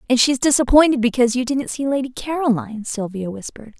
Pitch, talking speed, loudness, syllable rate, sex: 250 Hz, 175 wpm, -19 LUFS, 6.5 syllables/s, female